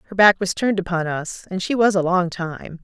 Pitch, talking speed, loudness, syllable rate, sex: 185 Hz, 255 wpm, -20 LUFS, 5.4 syllables/s, female